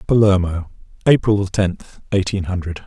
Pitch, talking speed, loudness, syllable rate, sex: 95 Hz, 105 wpm, -18 LUFS, 4.4 syllables/s, male